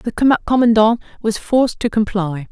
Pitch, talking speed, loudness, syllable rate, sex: 220 Hz, 145 wpm, -16 LUFS, 4.7 syllables/s, female